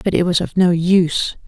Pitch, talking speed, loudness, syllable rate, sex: 175 Hz, 245 wpm, -16 LUFS, 5.3 syllables/s, female